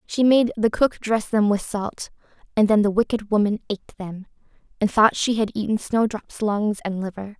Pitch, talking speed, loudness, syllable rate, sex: 210 Hz, 195 wpm, -22 LUFS, 4.9 syllables/s, female